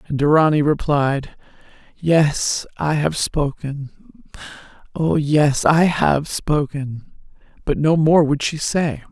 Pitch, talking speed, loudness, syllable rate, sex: 150 Hz, 120 wpm, -18 LUFS, 3.3 syllables/s, female